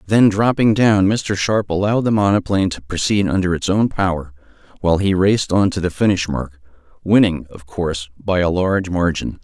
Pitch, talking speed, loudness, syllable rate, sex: 95 Hz, 185 wpm, -17 LUFS, 5.5 syllables/s, male